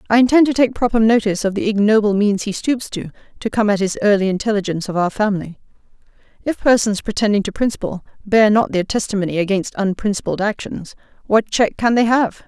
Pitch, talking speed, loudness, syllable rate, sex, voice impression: 210 Hz, 190 wpm, -17 LUFS, 6.2 syllables/s, female, feminine, adult-like, slightly hard, muffled, fluent, slightly raspy, intellectual, elegant, slightly strict, sharp